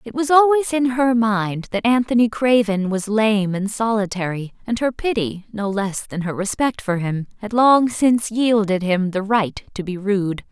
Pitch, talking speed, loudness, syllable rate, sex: 215 Hz, 190 wpm, -19 LUFS, 4.4 syllables/s, female